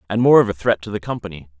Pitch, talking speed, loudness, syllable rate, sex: 100 Hz, 300 wpm, -18 LUFS, 7.5 syllables/s, male